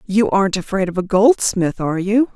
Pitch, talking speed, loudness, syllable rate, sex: 200 Hz, 205 wpm, -17 LUFS, 5.4 syllables/s, female